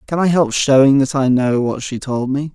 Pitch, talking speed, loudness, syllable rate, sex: 135 Hz, 260 wpm, -15 LUFS, 5.0 syllables/s, male